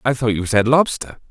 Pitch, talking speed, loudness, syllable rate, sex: 120 Hz, 230 wpm, -17 LUFS, 5.3 syllables/s, male